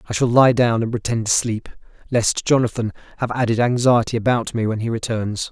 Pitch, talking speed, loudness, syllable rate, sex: 115 Hz, 195 wpm, -19 LUFS, 5.5 syllables/s, male